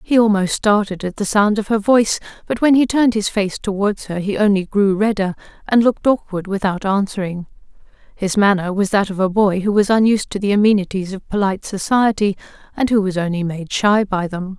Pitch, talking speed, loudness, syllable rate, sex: 200 Hz, 205 wpm, -17 LUFS, 5.7 syllables/s, female